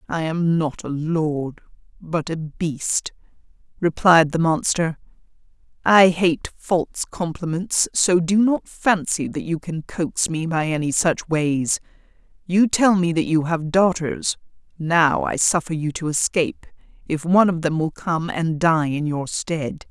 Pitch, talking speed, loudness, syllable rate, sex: 165 Hz, 155 wpm, -20 LUFS, 3.9 syllables/s, female